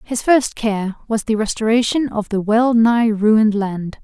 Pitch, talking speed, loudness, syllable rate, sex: 220 Hz, 180 wpm, -17 LUFS, 4.2 syllables/s, female